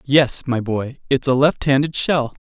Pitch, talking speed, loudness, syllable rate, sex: 135 Hz, 170 wpm, -18 LUFS, 4.3 syllables/s, male